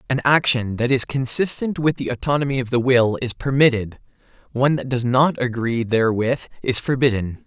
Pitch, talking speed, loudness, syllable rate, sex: 125 Hz, 170 wpm, -20 LUFS, 5.4 syllables/s, male